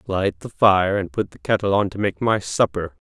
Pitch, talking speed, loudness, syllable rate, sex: 95 Hz, 235 wpm, -21 LUFS, 4.9 syllables/s, male